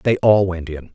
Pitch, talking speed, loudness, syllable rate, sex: 95 Hz, 255 wpm, -17 LUFS, 4.8 syllables/s, male